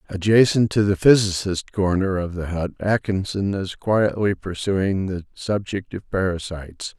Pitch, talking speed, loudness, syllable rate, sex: 95 Hz, 135 wpm, -21 LUFS, 4.4 syllables/s, male